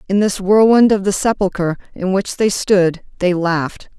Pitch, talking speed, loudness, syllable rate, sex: 190 Hz, 180 wpm, -16 LUFS, 4.6 syllables/s, female